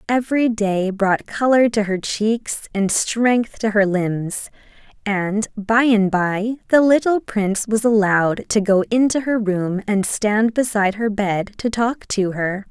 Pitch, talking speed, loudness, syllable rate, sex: 215 Hz, 165 wpm, -19 LUFS, 3.9 syllables/s, female